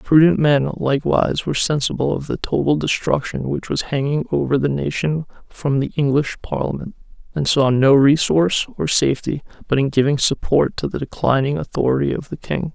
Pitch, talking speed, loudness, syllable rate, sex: 145 Hz, 170 wpm, -19 LUFS, 5.5 syllables/s, male